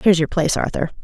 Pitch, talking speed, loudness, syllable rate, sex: 170 Hz, 230 wpm, -19 LUFS, 7.8 syllables/s, female